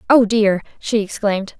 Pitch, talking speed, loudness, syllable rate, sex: 210 Hz, 150 wpm, -18 LUFS, 4.9 syllables/s, female